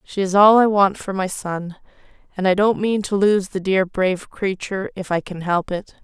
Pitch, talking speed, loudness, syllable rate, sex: 190 Hz, 230 wpm, -19 LUFS, 5.0 syllables/s, female